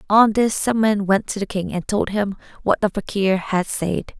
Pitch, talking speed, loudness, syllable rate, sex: 200 Hz, 230 wpm, -20 LUFS, 4.5 syllables/s, female